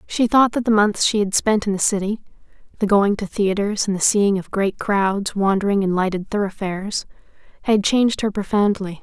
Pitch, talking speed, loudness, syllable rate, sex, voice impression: 205 Hz, 195 wpm, -19 LUFS, 5.2 syllables/s, female, feminine, adult-like, slightly relaxed, weak, soft, intellectual, calm, friendly, reassuring, elegant, slightly lively, kind, modest